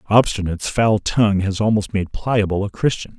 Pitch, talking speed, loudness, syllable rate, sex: 100 Hz, 170 wpm, -19 LUFS, 5.4 syllables/s, male